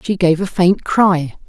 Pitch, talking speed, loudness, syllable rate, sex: 180 Hz, 205 wpm, -15 LUFS, 3.9 syllables/s, male